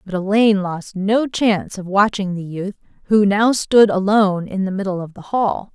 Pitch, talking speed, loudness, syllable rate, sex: 200 Hz, 200 wpm, -18 LUFS, 4.9 syllables/s, female